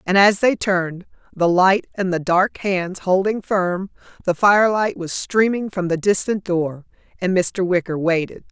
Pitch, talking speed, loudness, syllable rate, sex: 185 Hz, 170 wpm, -19 LUFS, 4.4 syllables/s, female